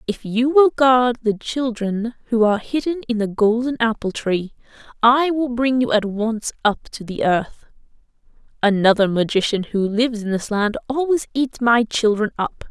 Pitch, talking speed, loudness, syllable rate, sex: 230 Hz, 170 wpm, -19 LUFS, 4.6 syllables/s, female